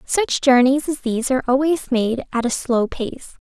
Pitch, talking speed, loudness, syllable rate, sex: 260 Hz, 190 wpm, -19 LUFS, 4.7 syllables/s, female